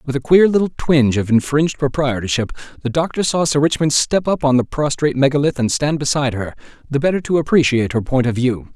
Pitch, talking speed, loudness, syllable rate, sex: 140 Hz, 210 wpm, -17 LUFS, 6.3 syllables/s, male